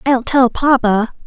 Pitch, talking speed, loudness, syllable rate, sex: 245 Hz, 140 wpm, -14 LUFS, 3.8 syllables/s, female